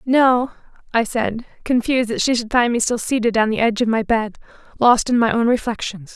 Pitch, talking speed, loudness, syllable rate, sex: 230 Hz, 215 wpm, -18 LUFS, 5.5 syllables/s, female